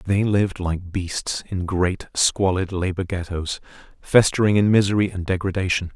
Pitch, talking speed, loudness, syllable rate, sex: 95 Hz, 140 wpm, -21 LUFS, 4.7 syllables/s, male